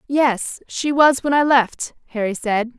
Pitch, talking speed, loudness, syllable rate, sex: 255 Hz, 175 wpm, -18 LUFS, 3.9 syllables/s, female